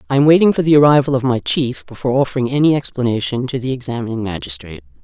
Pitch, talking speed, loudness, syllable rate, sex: 135 Hz, 205 wpm, -16 LUFS, 7.4 syllables/s, female